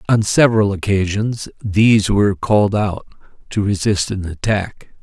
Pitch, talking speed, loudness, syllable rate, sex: 100 Hz, 130 wpm, -17 LUFS, 4.6 syllables/s, male